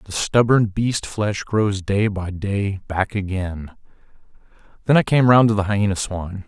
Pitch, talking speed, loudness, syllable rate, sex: 100 Hz, 165 wpm, -20 LUFS, 4.2 syllables/s, male